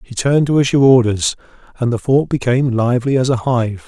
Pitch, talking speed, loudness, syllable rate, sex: 125 Hz, 200 wpm, -15 LUFS, 6.0 syllables/s, male